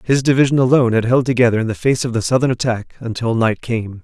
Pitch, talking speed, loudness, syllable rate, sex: 120 Hz, 240 wpm, -16 LUFS, 6.4 syllables/s, male